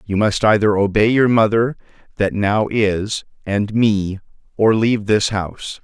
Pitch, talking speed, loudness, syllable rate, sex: 105 Hz, 155 wpm, -17 LUFS, 4.3 syllables/s, male